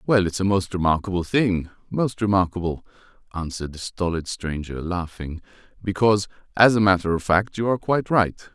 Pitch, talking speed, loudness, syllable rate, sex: 95 Hz, 155 wpm, -22 LUFS, 5.6 syllables/s, male